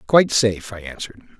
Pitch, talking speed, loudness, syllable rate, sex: 110 Hz, 175 wpm, -19 LUFS, 7.0 syllables/s, male